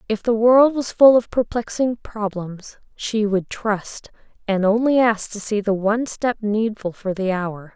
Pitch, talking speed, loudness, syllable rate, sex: 215 Hz, 180 wpm, -20 LUFS, 4.2 syllables/s, female